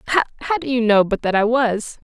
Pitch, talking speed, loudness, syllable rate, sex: 235 Hz, 230 wpm, -18 LUFS, 7.7 syllables/s, female